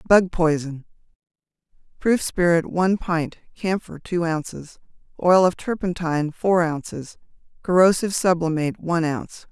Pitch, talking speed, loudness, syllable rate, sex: 170 Hz, 105 wpm, -21 LUFS, 4.9 syllables/s, female